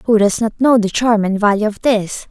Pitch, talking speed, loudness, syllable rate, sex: 215 Hz, 260 wpm, -15 LUFS, 5.0 syllables/s, female